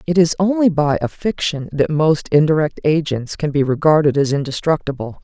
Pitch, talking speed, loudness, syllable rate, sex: 155 Hz, 170 wpm, -17 LUFS, 5.2 syllables/s, female